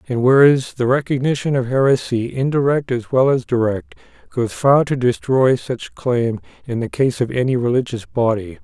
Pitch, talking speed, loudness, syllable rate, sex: 125 Hz, 165 wpm, -18 LUFS, 4.8 syllables/s, male